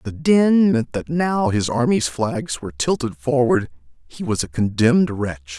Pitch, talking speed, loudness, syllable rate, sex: 125 Hz, 185 wpm, -19 LUFS, 4.4 syllables/s, male